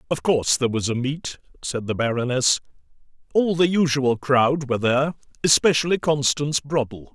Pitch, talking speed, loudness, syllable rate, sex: 135 Hz, 150 wpm, -21 LUFS, 5.5 syllables/s, male